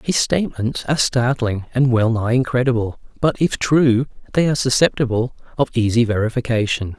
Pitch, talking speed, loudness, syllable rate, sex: 125 Hz, 145 wpm, -18 LUFS, 5.5 syllables/s, male